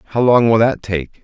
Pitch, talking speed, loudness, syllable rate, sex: 110 Hz, 245 wpm, -15 LUFS, 5.3 syllables/s, male